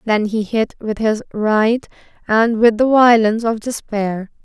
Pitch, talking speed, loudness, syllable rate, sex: 220 Hz, 160 wpm, -16 LUFS, 4.1 syllables/s, female